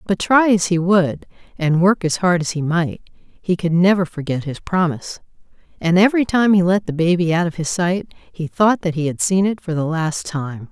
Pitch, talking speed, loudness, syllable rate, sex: 175 Hz, 225 wpm, -18 LUFS, 5.0 syllables/s, female